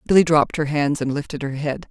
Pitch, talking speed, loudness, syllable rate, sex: 150 Hz, 250 wpm, -20 LUFS, 6.1 syllables/s, female